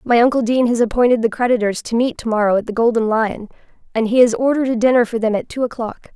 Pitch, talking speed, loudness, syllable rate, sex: 230 Hz, 255 wpm, -17 LUFS, 6.8 syllables/s, female